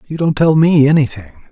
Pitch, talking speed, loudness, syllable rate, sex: 140 Hz, 200 wpm, -12 LUFS, 6.1 syllables/s, male